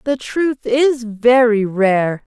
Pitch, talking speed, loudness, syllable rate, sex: 235 Hz, 125 wpm, -16 LUFS, 2.8 syllables/s, female